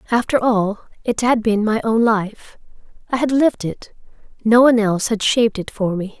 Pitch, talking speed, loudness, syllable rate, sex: 220 Hz, 195 wpm, -17 LUFS, 5.3 syllables/s, female